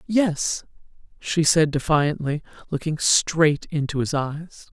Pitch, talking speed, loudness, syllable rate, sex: 155 Hz, 115 wpm, -22 LUFS, 3.4 syllables/s, female